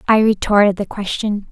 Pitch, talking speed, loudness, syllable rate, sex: 205 Hz, 160 wpm, -16 LUFS, 5.2 syllables/s, female